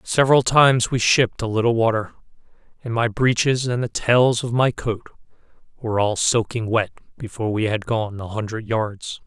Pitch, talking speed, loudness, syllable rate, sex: 115 Hz, 175 wpm, -20 LUFS, 5.2 syllables/s, male